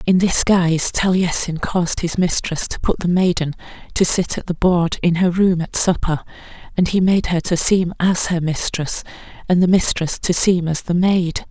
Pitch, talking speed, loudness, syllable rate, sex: 175 Hz, 200 wpm, -17 LUFS, 4.7 syllables/s, female